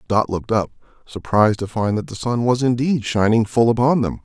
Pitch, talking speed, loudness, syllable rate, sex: 115 Hz, 210 wpm, -19 LUFS, 5.7 syllables/s, male